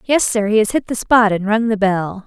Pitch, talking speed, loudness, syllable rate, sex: 215 Hz, 290 wpm, -16 LUFS, 5.1 syllables/s, female